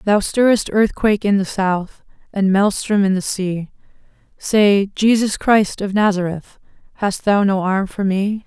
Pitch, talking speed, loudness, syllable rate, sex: 200 Hz, 155 wpm, -17 LUFS, 4.2 syllables/s, female